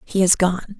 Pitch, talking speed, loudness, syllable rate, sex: 190 Hz, 225 wpm, -18 LUFS, 4.4 syllables/s, female